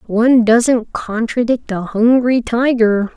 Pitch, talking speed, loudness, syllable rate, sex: 230 Hz, 115 wpm, -14 LUFS, 3.7 syllables/s, female